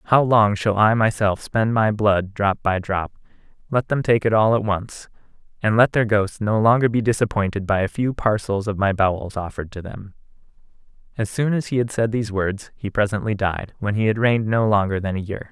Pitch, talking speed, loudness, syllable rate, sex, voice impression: 105 Hz, 215 wpm, -20 LUFS, 5.3 syllables/s, male, very masculine, very adult-like, thick, relaxed, weak, slightly dark, soft, slightly muffled, fluent, slightly raspy, very cool, very intellectual, slightly refreshing, very sincere, very calm, very mature, friendly, very reassuring, unique, very elegant, slightly wild, very sweet, slightly lively, very kind, very modest